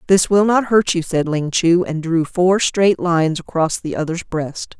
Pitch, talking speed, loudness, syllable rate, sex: 175 Hz, 215 wpm, -17 LUFS, 4.3 syllables/s, female